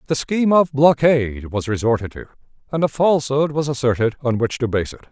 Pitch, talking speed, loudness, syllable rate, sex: 135 Hz, 200 wpm, -19 LUFS, 6.1 syllables/s, male